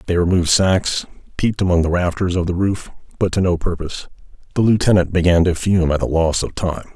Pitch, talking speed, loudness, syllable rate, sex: 90 Hz, 205 wpm, -18 LUFS, 6.0 syllables/s, male